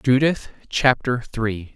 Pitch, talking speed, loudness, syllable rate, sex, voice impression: 125 Hz, 105 wpm, -21 LUFS, 3.3 syllables/s, male, very masculine, very adult-like, very middle-aged, very thick, very tensed, very powerful, slightly dark, hard, muffled, fluent, cool, very intellectual, refreshing, very sincere, very calm, mature, very friendly, very reassuring, unique, elegant, slightly wild, sweet, slightly lively, kind, slightly modest